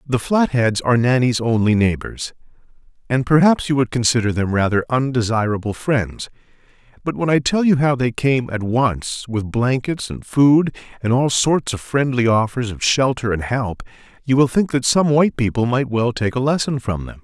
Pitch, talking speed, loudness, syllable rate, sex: 125 Hz, 185 wpm, -18 LUFS, 4.9 syllables/s, male